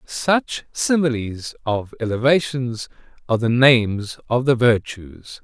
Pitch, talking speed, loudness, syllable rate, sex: 125 Hz, 110 wpm, -19 LUFS, 3.9 syllables/s, male